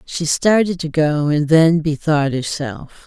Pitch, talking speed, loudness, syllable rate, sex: 155 Hz, 155 wpm, -17 LUFS, 3.7 syllables/s, female